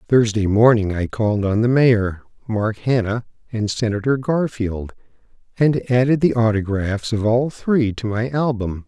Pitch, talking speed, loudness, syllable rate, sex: 115 Hz, 150 wpm, -19 LUFS, 4.4 syllables/s, male